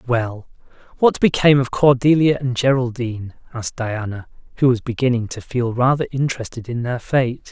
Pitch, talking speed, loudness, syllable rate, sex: 125 Hz, 150 wpm, -19 LUFS, 5.4 syllables/s, male